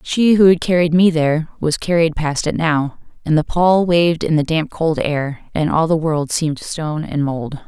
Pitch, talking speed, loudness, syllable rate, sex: 160 Hz, 220 wpm, -17 LUFS, 4.8 syllables/s, female